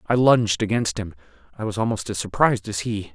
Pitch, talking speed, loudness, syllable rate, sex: 110 Hz, 190 wpm, -22 LUFS, 6.0 syllables/s, male